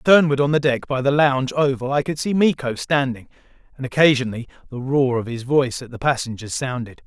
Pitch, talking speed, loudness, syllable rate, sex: 135 Hz, 205 wpm, -20 LUFS, 5.9 syllables/s, male